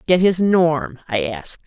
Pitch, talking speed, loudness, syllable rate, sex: 165 Hz, 180 wpm, -18 LUFS, 4.4 syllables/s, female